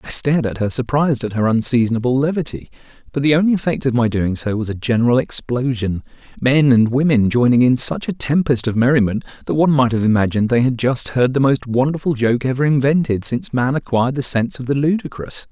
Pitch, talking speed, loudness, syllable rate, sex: 130 Hz, 210 wpm, -17 LUFS, 6.2 syllables/s, male